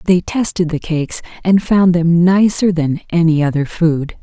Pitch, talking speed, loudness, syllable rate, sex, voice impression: 170 Hz, 170 wpm, -14 LUFS, 4.5 syllables/s, female, feminine, gender-neutral, very adult-like, very middle-aged, thin, relaxed, weak, bright, very soft, slightly clear, fluent, slightly raspy, cute, cool, very intellectual, very refreshing, sincere, very calm, very friendly, very reassuring, very unique, very elegant, wild, very sweet, lively, very kind, modest, light